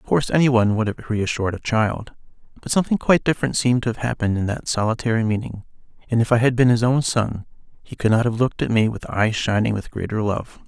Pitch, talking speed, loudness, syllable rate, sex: 115 Hz, 235 wpm, -20 LUFS, 6.7 syllables/s, male